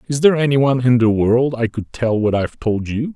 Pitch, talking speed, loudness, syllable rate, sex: 125 Hz, 265 wpm, -17 LUFS, 6.0 syllables/s, male